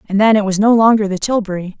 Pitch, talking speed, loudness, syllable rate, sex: 205 Hz, 265 wpm, -14 LUFS, 6.6 syllables/s, female